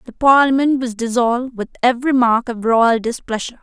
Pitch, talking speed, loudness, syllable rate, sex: 240 Hz, 165 wpm, -16 LUFS, 5.7 syllables/s, female